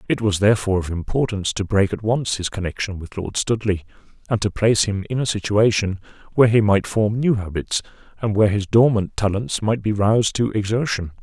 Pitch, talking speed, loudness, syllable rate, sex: 105 Hz, 200 wpm, -20 LUFS, 5.8 syllables/s, male